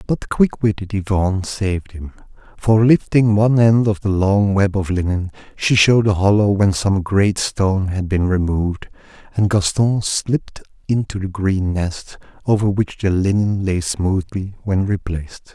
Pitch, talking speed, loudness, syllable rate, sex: 100 Hz, 160 wpm, -18 LUFS, 4.7 syllables/s, male